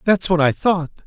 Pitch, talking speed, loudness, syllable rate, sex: 170 Hz, 225 wpm, -18 LUFS, 5.0 syllables/s, male